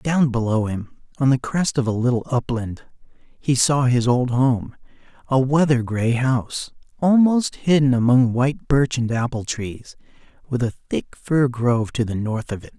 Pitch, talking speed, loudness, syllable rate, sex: 125 Hz, 175 wpm, -20 LUFS, 4.5 syllables/s, male